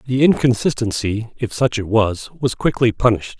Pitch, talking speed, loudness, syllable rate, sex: 115 Hz, 160 wpm, -18 LUFS, 5.1 syllables/s, male